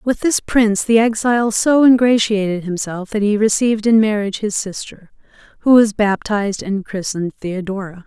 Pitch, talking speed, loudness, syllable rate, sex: 210 Hz, 155 wpm, -16 LUFS, 5.2 syllables/s, female